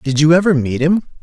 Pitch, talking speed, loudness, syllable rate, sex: 155 Hz, 245 wpm, -14 LUFS, 5.7 syllables/s, male